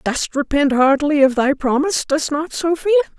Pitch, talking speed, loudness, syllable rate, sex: 285 Hz, 170 wpm, -17 LUFS, 5.3 syllables/s, female